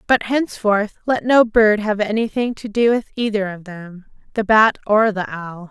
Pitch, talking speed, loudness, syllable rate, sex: 215 Hz, 190 wpm, -18 LUFS, 4.6 syllables/s, female